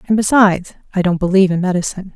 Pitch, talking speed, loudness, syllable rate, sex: 190 Hz, 195 wpm, -15 LUFS, 7.9 syllables/s, female